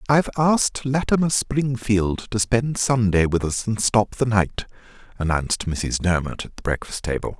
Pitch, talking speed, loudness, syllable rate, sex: 115 Hz, 160 wpm, -21 LUFS, 4.7 syllables/s, male